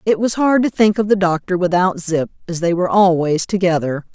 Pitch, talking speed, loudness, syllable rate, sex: 185 Hz, 215 wpm, -16 LUFS, 5.5 syllables/s, female